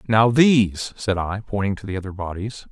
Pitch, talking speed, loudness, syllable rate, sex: 105 Hz, 200 wpm, -21 LUFS, 5.2 syllables/s, male